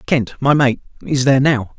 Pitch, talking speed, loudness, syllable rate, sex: 130 Hz, 135 wpm, -16 LUFS, 5.2 syllables/s, male